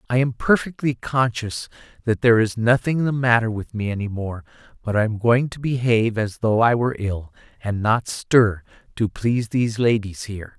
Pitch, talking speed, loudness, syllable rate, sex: 115 Hz, 185 wpm, -21 LUFS, 5.2 syllables/s, male